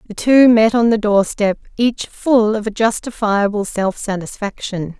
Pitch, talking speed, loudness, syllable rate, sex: 215 Hz, 155 wpm, -16 LUFS, 4.3 syllables/s, female